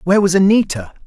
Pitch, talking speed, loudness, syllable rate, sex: 185 Hz, 170 wpm, -14 LUFS, 6.9 syllables/s, male